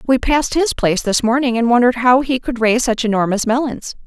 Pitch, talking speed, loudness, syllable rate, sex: 245 Hz, 220 wpm, -16 LUFS, 6.3 syllables/s, female